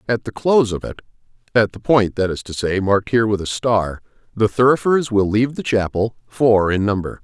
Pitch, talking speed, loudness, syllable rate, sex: 110 Hz, 205 wpm, -18 LUFS, 5.6 syllables/s, male